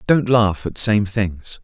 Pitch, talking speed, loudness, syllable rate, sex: 105 Hz, 185 wpm, -18 LUFS, 3.4 syllables/s, male